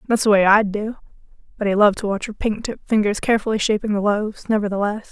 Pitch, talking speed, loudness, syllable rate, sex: 210 Hz, 225 wpm, -19 LUFS, 7.0 syllables/s, female